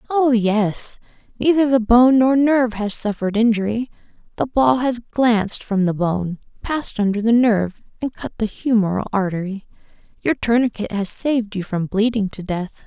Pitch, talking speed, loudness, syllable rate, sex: 225 Hz, 165 wpm, -19 LUFS, 4.9 syllables/s, female